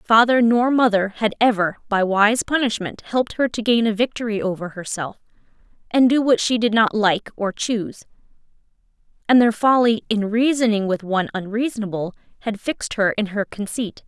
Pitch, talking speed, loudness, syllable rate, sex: 220 Hz, 165 wpm, -20 LUFS, 5.3 syllables/s, female